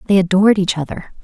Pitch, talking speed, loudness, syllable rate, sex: 190 Hz, 195 wpm, -15 LUFS, 7.1 syllables/s, female